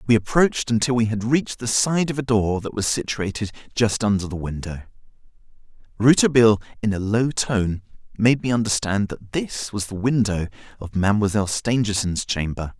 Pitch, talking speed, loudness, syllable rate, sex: 110 Hz, 165 wpm, -21 LUFS, 5.5 syllables/s, male